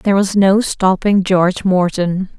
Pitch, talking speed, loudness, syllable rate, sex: 190 Hz, 150 wpm, -14 LUFS, 4.4 syllables/s, female